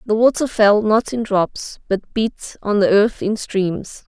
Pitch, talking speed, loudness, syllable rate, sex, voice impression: 210 Hz, 190 wpm, -18 LUFS, 3.7 syllables/s, female, slightly gender-neutral, young, slightly calm, friendly